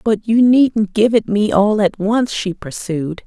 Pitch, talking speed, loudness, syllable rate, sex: 210 Hz, 200 wpm, -15 LUFS, 3.8 syllables/s, female